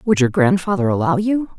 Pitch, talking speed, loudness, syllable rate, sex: 225 Hz, 190 wpm, -17 LUFS, 5.7 syllables/s, female